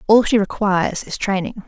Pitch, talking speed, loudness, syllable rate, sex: 200 Hz, 180 wpm, -18 LUFS, 5.3 syllables/s, female